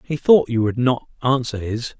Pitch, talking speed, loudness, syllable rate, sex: 125 Hz, 210 wpm, -19 LUFS, 4.9 syllables/s, male